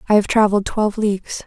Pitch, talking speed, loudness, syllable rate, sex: 205 Hz, 205 wpm, -18 LUFS, 7.0 syllables/s, female